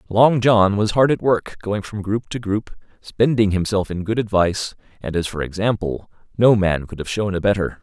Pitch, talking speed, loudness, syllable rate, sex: 100 Hz, 205 wpm, -19 LUFS, 5.0 syllables/s, male